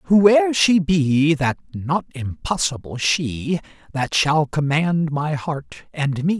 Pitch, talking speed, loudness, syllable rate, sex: 155 Hz, 130 wpm, -20 LUFS, 3.3 syllables/s, male